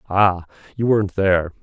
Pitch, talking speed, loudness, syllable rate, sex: 95 Hz, 145 wpm, -19 LUFS, 5.6 syllables/s, male